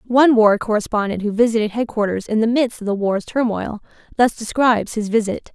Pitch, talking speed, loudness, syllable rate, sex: 220 Hz, 185 wpm, -18 LUFS, 5.7 syllables/s, female